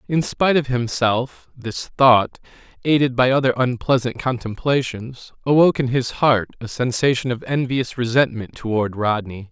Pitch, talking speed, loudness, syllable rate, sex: 125 Hz, 140 wpm, -19 LUFS, 4.7 syllables/s, male